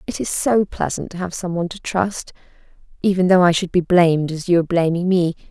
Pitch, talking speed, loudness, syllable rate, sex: 175 Hz, 230 wpm, -18 LUFS, 5.9 syllables/s, female